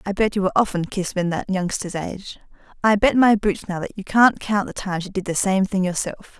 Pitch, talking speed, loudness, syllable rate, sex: 195 Hz, 255 wpm, -21 LUFS, 6.0 syllables/s, female